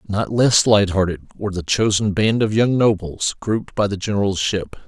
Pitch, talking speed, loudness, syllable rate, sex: 100 Hz, 195 wpm, -19 LUFS, 5.2 syllables/s, male